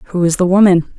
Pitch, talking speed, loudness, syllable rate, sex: 180 Hz, 245 wpm, -12 LUFS, 5.4 syllables/s, female